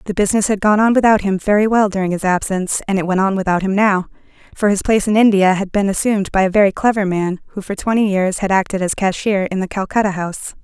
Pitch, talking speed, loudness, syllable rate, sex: 200 Hz, 250 wpm, -16 LUFS, 6.6 syllables/s, female